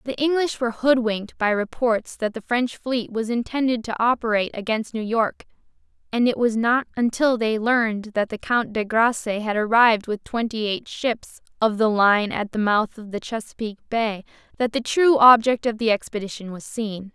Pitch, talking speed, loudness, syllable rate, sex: 225 Hz, 190 wpm, -22 LUFS, 5.0 syllables/s, female